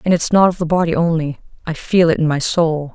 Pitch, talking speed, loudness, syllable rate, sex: 165 Hz, 265 wpm, -16 LUFS, 5.8 syllables/s, female